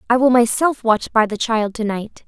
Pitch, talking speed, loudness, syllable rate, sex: 230 Hz, 235 wpm, -17 LUFS, 4.8 syllables/s, female